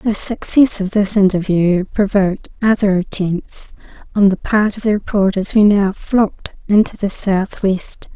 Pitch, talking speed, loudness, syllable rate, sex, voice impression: 200 Hz, 145 wpm, -16 LUFS, 4.3 syllables/s, female, feminine, slightly adult-like, slightly raspy, slightly cute, calm, kind, slightly light